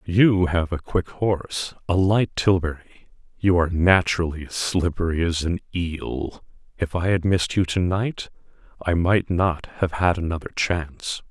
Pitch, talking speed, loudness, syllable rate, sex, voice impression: 90 Hz, 160 wpm, -22 LUFS, 4.4 syllables/s, male, very masculine, very adult-like, thick, cool, wild